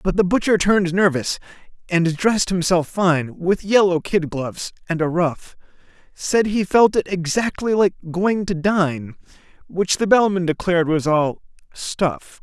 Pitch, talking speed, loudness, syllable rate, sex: 180 Hz, 155 wpm, -19 LUFS, 4.3 syllables/s, male